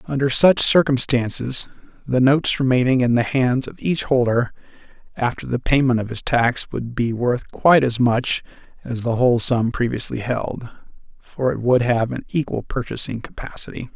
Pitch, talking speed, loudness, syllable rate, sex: 125 Hz, 165 wpm, -19 LUFS, 4.9 syllables/s, male